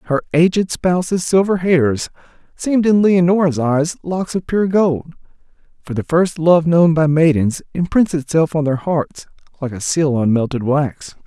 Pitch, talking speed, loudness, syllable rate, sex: 160 Hz, 165 wpm, -16 LUFS, 4.3 syllables/s, male